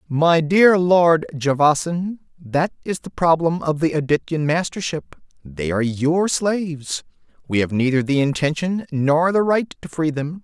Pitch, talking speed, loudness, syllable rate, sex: 160 Hz, 155 wpm, -19 LUFS, 4.3 syllables/s, male